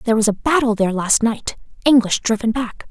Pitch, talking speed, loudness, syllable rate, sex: 225 Hz, 185 wpm, -17 LUFS, 5.9 syllables/s, female